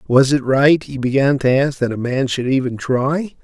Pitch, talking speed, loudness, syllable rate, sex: 135 Hz, 225 wpm, -17 LUFS, 4.7 syllables/s, male